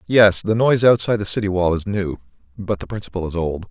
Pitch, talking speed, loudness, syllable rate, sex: 95 Hz, 225 wpm, -19 LUFS, 6.3 syllables/s, male